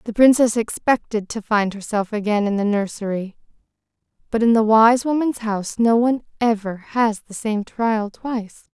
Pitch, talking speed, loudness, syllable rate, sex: 220 Hz, 165 wpm, -20 LUFS, 4.9 syllables/s, female